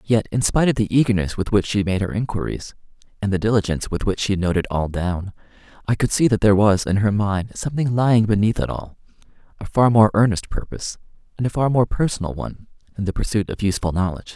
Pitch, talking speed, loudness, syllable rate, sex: 105 Hz, 215 wpm, -20 LUFS, 6.5 syllables/s, male